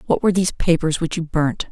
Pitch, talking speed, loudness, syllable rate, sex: 165 Hz, 245 wpm, -20 LUFS, 6.5 syllables/s, female